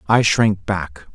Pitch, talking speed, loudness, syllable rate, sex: 100 Hz, 155 wpm, -18 LUFS, 3.3 syllables/s, male